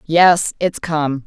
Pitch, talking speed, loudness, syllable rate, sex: 160 Hz, 145 wpm, -16 LUFS, 2.7 syllables/s, female